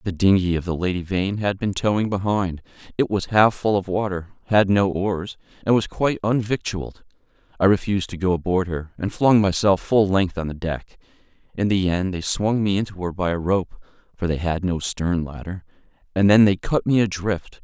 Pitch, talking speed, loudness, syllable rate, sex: 95 Hz, 205 wpm, -21 LUFS, 5.0 syllables/s, male